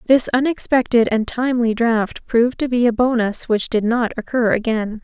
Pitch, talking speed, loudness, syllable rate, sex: 235 Hz, 180 wpm, -18 LUFS, 5.0 syllables/s, female